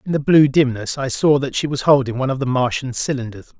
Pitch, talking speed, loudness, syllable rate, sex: 135 Hz, 250 wpm, -18 LUFS, 6.1 syllables/s, male